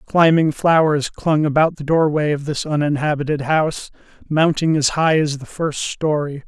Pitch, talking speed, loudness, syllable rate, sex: 150 Hz, 155 wpm, -18 LUFS, 4.7 syllables/s, male